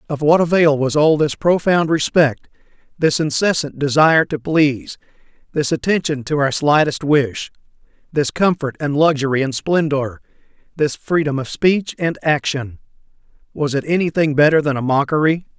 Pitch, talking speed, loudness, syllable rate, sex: 150 Hz, 145 wpm, -17 LUFS, 4.9 syllables/s, male